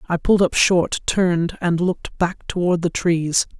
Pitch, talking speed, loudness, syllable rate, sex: 175 Hz, 185 wpm, -19 LUFS, 4.5 syllables/s, female